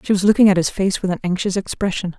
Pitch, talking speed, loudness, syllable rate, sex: 190 Hz, 275 wpm, -18 LUFS, 6.8 syllables/s, female